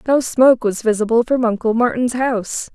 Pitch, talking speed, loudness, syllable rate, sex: 235 Hz, 175 wpm, -17 LUFS, 5.4 syllables/s, female